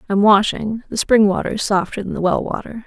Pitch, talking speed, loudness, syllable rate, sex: 210 Hz, 210 wpm, -18 LUFS, 5.8 syllables/s, female